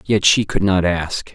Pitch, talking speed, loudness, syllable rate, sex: 95 Hz, 225 wpm, -17 LUFS, 4.0 syllables/s, male